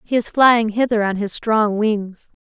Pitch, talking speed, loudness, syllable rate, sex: 220 Hz, 200 wpm, -17 LUFS, 4.0 syllables/s, female